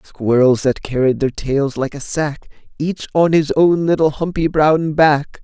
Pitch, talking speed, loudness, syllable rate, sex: 150 Hz, 175 wpm, -16 LUFS, 4.0 syllables/s, male